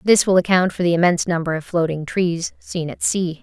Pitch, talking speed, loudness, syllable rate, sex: 175 Hz, 230 wpm, -19 LUFS, 5.5 syllables/s, female